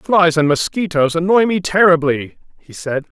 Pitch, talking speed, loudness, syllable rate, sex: 165 Hz, 170 wpm, -15 LUFS, 4.9 syllables/s, male